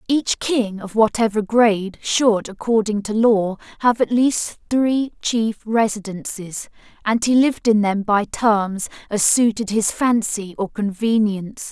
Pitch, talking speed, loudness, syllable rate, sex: 215 Hz, 145 wpm, -19 LUFS, 4.0 syllables/s, female